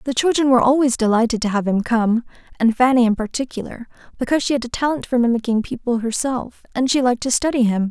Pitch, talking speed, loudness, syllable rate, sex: 245 Hz, 215 wpm, -19 LUFS, 6.5 syllables/s, female